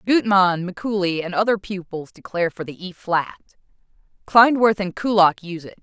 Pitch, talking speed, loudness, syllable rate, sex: 190 Hz, 155 wpm, -19 LUFS, 5.0 syllables/s, female